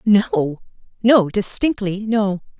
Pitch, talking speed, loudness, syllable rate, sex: 205 Hz, 70 wpm, -18 LUFS, 3.1 syllables/s, female